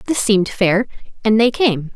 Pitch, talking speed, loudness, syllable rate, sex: 215 Hz, 185 wpm, -16 LUFS, 5.0 syllables/s, female